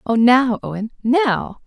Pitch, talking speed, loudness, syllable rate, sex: 240 Hz, 145 wpm, -17 LUFS, 3.6 syllables/s, female